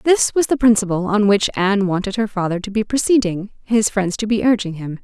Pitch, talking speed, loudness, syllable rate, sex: 210 Hz, 225 wpm, -18 LUFS, 5.7 syllables/s, female